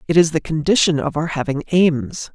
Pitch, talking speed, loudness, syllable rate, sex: 155 Hz, 205 wpm, -18 LUFS, 5.2 syllables/s, male